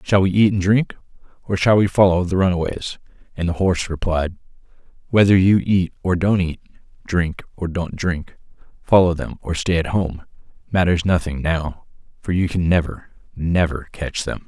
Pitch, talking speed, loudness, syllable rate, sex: 90 Hz, 170 wpm, -19 LUFS, 4.9 syllables/s, male